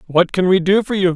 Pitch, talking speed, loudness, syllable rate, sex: 185 Hz, 310 wpm, -16 LUFS, 5.8 syllables/s, male